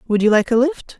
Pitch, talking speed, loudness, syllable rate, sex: 245 Hz, 300 wpm, -16 LUFS, 6.0 syllables/s, female